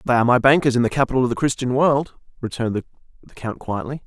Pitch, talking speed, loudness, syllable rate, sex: 125 Hz, 220 wpm, -20 LUFS, 7.2 syllables/s, male